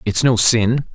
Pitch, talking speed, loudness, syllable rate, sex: 115 Hz, 190 wpm, -15 LUFS, 3.8 syllables/s, male